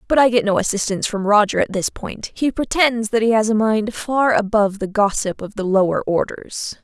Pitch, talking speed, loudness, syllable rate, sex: 220 Hz, 220 wpm, -18 LUFS, 5.3 syllables/s, female